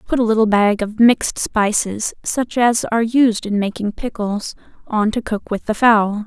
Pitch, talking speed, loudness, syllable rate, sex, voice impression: 220 Hz, 190 wpm, -17 LUFS, 4.5 syllables/s, female, very feminine, young, very thin, tensed, slightly weak, slightly bright, soft, clear, fluent, very cute, intellectual, refreshing, sincere, very calm, very friendly, very reassuring, very unique, very elegant, very sweet, lively, very kind, slightly sharp, modest, slightly light